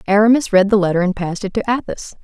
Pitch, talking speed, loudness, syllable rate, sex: 200 Hz, 240 wpm, -16 LUFS, 7.0 syllables/s, female